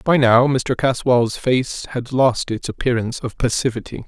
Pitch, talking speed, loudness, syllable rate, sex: 125 Hz, 160 wpm, -19 LUFS, 4.6 syllables/s, male